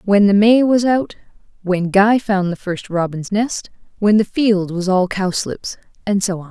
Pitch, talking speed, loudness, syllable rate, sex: 200 Hz, 165 wpm, -17 LUFS, 4.3 syllables/s, female